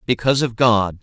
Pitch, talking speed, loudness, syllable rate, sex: 115 Hz, 175 wpm, -17 LUFS, 5.6 syllables/s, male